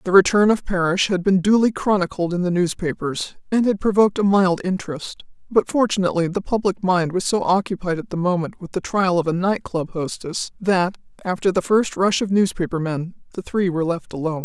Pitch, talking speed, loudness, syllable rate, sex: 185 Hz, 205 wpm, -20 LUFS, 5.6 syllables/s, female